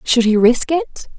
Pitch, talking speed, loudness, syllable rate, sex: 260 Hz, 200 wpm, -15 LUFS, 5.3 syllables/s, female